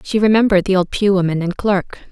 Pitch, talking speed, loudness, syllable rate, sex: 195 Hz, 225 wpm, -16 LUFS, 6.0 syllables/s, female